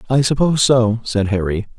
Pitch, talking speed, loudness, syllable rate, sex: 120 Hz, 170 wpm, -16 LUFS, 5.4 syllables/s, male